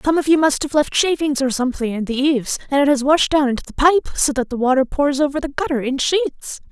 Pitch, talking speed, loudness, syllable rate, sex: 280 Hz, 270 wpm, -18 LUFS, 6.0 syllables/s, female